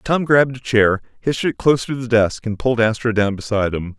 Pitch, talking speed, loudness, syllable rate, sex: 115 Hz, 240 wpm, -18 LUFS, 6.1 syllables/s, male